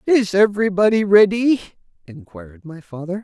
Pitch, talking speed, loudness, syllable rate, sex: 190 Hz, 110 wpm, -16 LUFS, 5.0 syllables/s, male